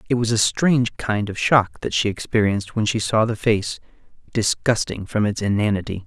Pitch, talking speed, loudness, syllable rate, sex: 110 Hz, 190 wpm, -21 LUFS, 5.3 syllables/s, male